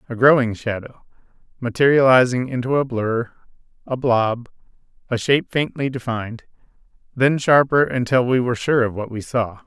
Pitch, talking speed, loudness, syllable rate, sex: 125 Hz, 135 wpm, -19 LUFS, 5.2 syllables/s, male